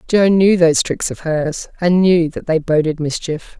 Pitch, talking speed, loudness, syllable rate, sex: 165 Hz, 200 wpm, -16 LUFS, 4.5 syllables/s, female